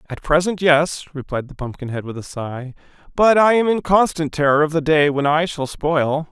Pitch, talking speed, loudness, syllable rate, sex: 155 Hz, 210 wpm, -18 LUFS, 5.0 syllables/s, male